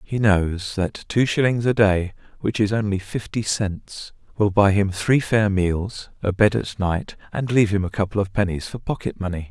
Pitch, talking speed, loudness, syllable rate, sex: 100 Hz, 200 wpm, -21 LUFS, 4.7 syllables/s, male